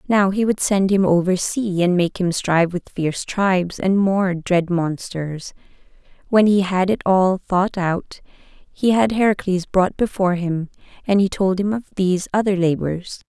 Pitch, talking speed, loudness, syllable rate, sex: 185 Hz, 170 wpm, -19 LUFS, 4.5 syllables/s, female